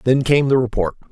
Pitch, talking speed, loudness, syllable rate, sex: 125 Hz, 215 wpm, -17 LUFS, 5.9 syllables/s, male